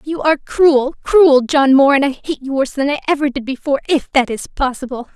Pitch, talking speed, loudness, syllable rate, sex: 280 Hz, 235 wpm, -15 LUFS, 5.9 syllables/s, female